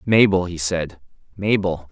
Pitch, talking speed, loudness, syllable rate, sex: 90 Hz, 125 wpm, -20 LUFS, 4.1 syllables/s, male